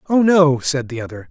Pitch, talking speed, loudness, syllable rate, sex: 145 Hz, 230 wpm, -15 LUFS, 5.3 syllables/s, male